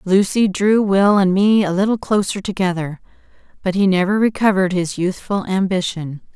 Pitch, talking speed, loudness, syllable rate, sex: 195 Hz, 150 wpm, -17 LUFS, 5.1 syllables/s, female